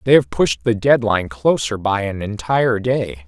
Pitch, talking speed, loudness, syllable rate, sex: 105 Hz, 185 wpm, -18 LUFS, 4.9 syllables/s, male